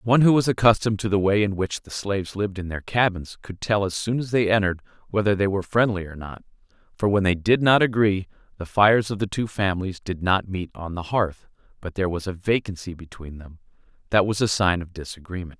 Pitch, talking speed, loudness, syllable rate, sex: 100 Hz, 225 wpm, -22 LUFS, 6.1 syllables/s, male